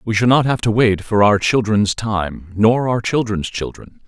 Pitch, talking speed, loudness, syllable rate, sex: 110 Hz, 205 wpm, -17 LUFS, 4.4 syllables/s, male